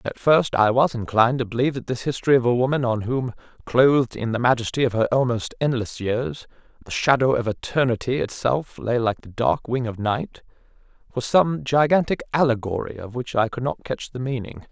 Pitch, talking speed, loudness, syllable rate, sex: 125 Hz, 195 wpm, -22 LUFS, 5.5 syllables/s, male